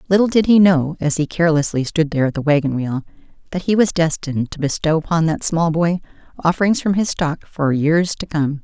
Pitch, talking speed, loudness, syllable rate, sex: 160 Hz, 215 wpm, -18 LUFS, 5.7 syllables/s, female